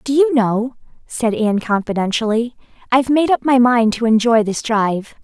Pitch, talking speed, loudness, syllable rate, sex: 235 Hz, 170 wpm, -16 LUFS, 5.2 syllables/s, female